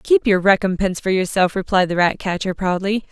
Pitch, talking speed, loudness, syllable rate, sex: 195 Hz, 175 wpm, -18 LUFS, 5.7 syllables/s, female